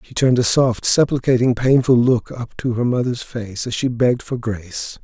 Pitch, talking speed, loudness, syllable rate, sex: 120 Hz, 205 wpm, -18 LUFS, 5.1 syllables/s, male